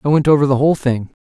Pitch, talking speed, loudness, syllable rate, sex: 140 Hz, 295 wpm, -15 LUFS, 7.7 syllables/s, male